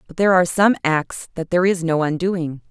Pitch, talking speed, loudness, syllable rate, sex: 170 Hz, 220 wpm, -19 LUFS, 6.0 syllables/s, female